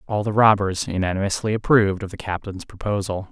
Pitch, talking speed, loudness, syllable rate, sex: 100 Hz, 165 wpm, -21 LUFS, 6.0 syllables/s, male